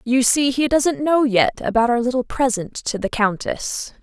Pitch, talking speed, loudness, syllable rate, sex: 250 Hz, 195 wpm, -19 LUFS, 4.4 syllables/s, female